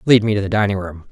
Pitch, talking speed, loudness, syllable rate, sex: 100 Hz, 325 wpm, -18 LUFS, 7.2 syllables/s, male